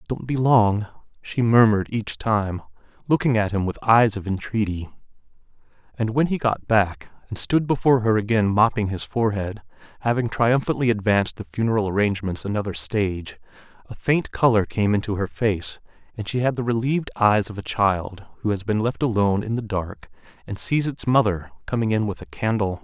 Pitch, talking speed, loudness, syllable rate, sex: 110 Hz, 180 wpm, -22 LUFS, 5.4 syllables/s, male